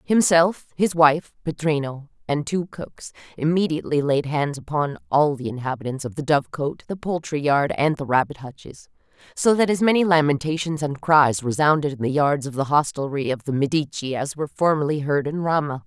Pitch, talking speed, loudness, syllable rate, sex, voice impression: 150 Hz, 180 wpm, -22 LUFS, 5.2 syllables/s, female, feminine, middle-aged, tensed, powerful, clear, fluent, intellectual, unique, lively, slightly intense, slightly sharp